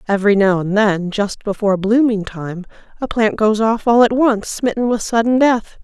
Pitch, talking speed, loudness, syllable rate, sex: 215 Hz, 195 wpm, -16 LUFS, 4.9 syllables/s, female